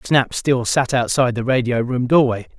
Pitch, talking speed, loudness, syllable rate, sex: 125 Hz, 185 wpm, -18 LUFS, 5.0 syllables/s, male